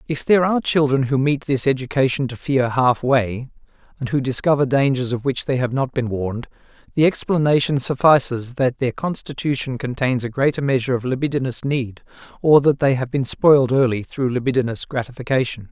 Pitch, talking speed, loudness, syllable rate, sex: 130 Hz, 175 wpm, -19 LUFS, 5.6 syllables/s, male